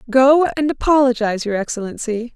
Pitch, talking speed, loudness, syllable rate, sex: 250 Hz, 130 wpm, -17 LUFS, 5.7 syllables/s, female